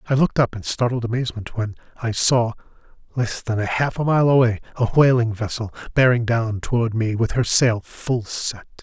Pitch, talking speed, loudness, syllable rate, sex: 120 Hz, 185 wpm, -20 LUFS, 5.2 syllables/s, male